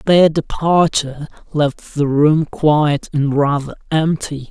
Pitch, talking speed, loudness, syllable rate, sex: 150 Hz, 120 wpm, -16 LUFS, 3.6 syllables/s, male